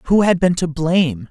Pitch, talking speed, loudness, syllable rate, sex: 170 Hz, 230 wpm, -16 LUFS, 4.7 syllables/s, male